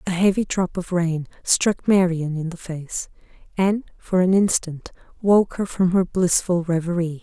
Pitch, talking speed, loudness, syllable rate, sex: 180 Hz, 165 wpm, -21 LUFS, 4.3 syllables/s, female